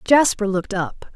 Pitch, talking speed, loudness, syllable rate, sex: 210 Hz, 155 wpm, -20 LUFS, 4.8 syllables/s, female